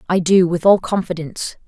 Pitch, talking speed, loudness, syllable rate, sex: 175 Hz, 180 wpm, -16 LUFS, 5.6 syllables/s, female